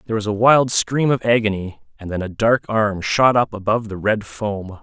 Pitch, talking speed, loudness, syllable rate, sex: 110 Hz, 225 wpm, -18 LUFS, 5.2 syllables/s, male